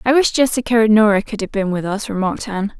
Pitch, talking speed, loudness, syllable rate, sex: 215 Hz, 260 wpm, -17 LUFS, 6.7 syllables/s, female